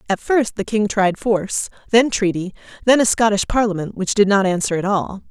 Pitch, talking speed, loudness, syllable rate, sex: 205 Hz, 205 wpm, -18 LUFS, 5.3 syllables/s, female